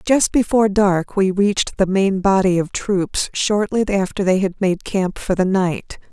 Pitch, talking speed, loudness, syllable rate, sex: 195 Hz, 185 wpm, -18 LUFS, 4.3 syllables/s, female